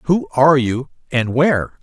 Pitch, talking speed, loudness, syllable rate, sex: 140 Hz, 130 wpm, -16 LUFS, 4.6 syllables/s, male